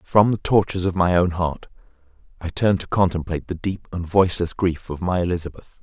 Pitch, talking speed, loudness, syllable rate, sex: 90 Hz, 195 wpm, -21 LUFS, 6.1 syllables/s, male